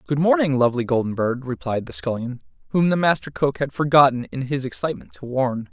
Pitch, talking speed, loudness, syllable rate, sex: 140 Hz, 200 wpm, -21 LUFS, 5.9 syllables/s, male